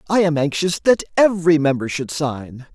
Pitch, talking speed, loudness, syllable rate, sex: 160 Hz, 175 wpm, -18 LUFS, 5.2 syllables/s, male